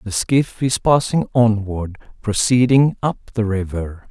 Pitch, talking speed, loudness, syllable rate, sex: 115 Hz, 115 wpm, -18 LUFS, 4.0 syllables/s, male